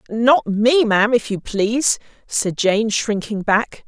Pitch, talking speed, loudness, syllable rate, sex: 220 Hz, 155 wpm, -18 LUFS, 3.9 syllables/s, female